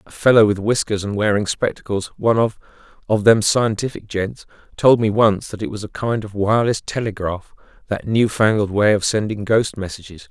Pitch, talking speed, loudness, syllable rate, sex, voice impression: 105 Hz, 170 wpm, -18 LUFS, 5.4 syllables/s, male, very masculine, very middle-aged, very thick, slightly relaxed, slightly weak, dark, soft, muffled, fluent, slightly raspy, cool, very intellectual, refreshing, very sincere, very calm, very mature, very friendly, very reassuring, unique, elegant, wild, sweet, lively, kind, modest